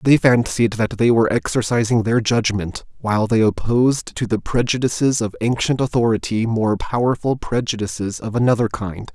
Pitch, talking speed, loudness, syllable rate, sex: 115 Hz, 150 wpm, -19 LUFS, 5.2 syllables/s, male